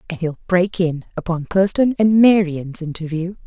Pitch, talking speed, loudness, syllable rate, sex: 180 Hz, 155 wpm, -18 LUFS, 4.8 syllables/s, female